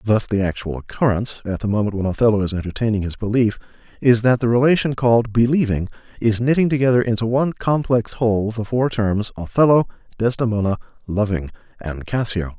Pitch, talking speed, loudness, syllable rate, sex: 110 Hz, 160 wpm, -19 LUFS, 6.0 syllables/s, male